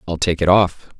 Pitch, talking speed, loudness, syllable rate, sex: 90 Hz, 240 wpm, -17 LUFS, 5.3 syllables/s, male